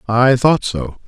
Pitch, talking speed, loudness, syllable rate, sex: 120 Hz, 165 wpm, -15 LUFS, 3.4 syllables/s, male